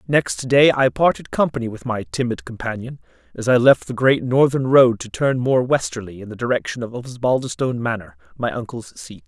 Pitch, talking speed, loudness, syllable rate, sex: 120 Hz, 190 wpm, -19 LUFS, 5.4 syllables/s, male